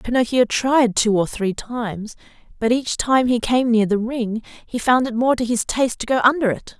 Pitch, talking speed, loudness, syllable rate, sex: 235 Hz, 220 wpm, -19 LUFS, 4.9 syllables/s, female